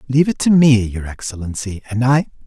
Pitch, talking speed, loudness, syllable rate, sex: 125 Hz, 195 wpm, -17 LUFS, 5.9 syllables/s, male